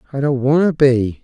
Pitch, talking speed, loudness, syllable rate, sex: 135 Hz, 245 wpm, -15 LUFS, 5.2 syllables/s, male